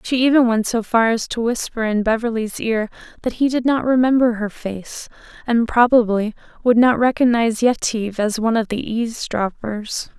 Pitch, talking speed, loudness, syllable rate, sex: 230 Hz, 170 wpm, -18 LUFS, 5.1 syllables/s, female